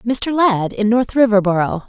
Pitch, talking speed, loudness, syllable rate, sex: 220 Hz, 160 wpm, -16 LUFS, 4.7 syllables/s, female